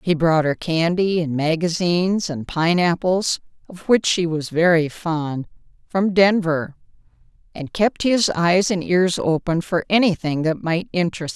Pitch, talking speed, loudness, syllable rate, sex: 170 Hz, 145 wpm, -19 LUFS, 4.3 syllables/s, female